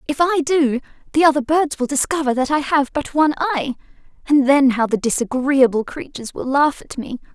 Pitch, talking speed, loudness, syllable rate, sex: 280 Hz, 195 wpm, -18 LUFS, 5.4 syllables/s, female